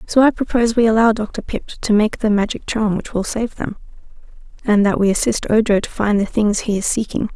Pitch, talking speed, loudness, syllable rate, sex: 215 Hz, 230 wpm, -18 LUFS, 5.6 syllables/s, female